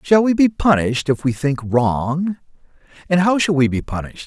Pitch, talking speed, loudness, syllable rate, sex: 155 Hz, 195 wpm, -18 LUFS, 5.2 syllables/s, male